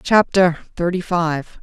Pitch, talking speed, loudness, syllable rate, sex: 175 Hz, 110 wpm, -18 LUFS, 3.7 syllables/s, female